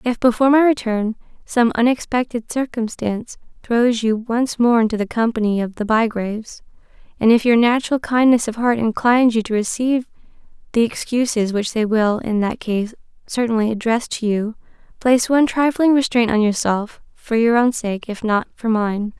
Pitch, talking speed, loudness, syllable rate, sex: 230 Hz, 170 wpm, -18 LUFS, 5.2 syllables/s, female